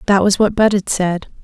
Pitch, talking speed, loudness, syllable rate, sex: 195 Hz, 210 wpm, -15 LUFS, 4.3 syllables/s, female